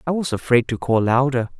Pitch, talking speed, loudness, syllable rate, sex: 130 Hz, 225 wpm, -19 LUFS, 5.8 syllables/s, male